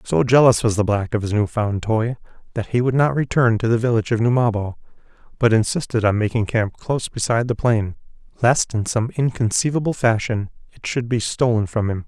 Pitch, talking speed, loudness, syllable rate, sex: 115 Hz, 200 wpm, -19 LUFS, 5.8 syllables/s, male